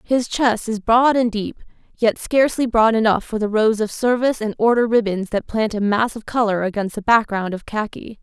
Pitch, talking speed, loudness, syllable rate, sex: 220 Hz, 210 wpm, -19 LUFS, 5.2 syllables/s, female